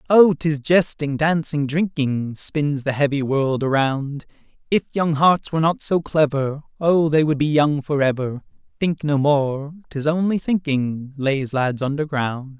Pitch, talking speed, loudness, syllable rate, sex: 145 Hz, 155 wpm, -20 LUFS, 4.1 syllables/s, male